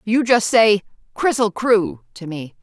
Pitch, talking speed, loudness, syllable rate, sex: 210 Hz, 160 wpm, -17 LUFS, 4.0 syllables/s, female